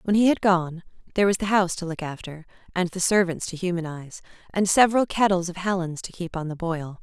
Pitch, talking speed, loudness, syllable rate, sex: 180 Hz, 220 wpm, -24 LUFS, 6.2 syllables/s, female